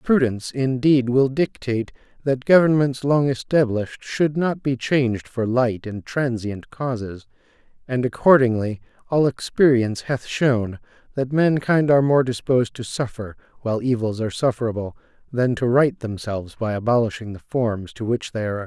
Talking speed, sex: 150 wpm, male